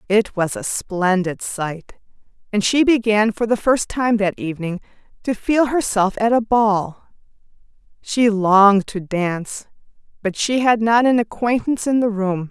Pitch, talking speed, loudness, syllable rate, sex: 210 Hz, 160 wpm, -18 LUFS, 4.4 syllables/s, female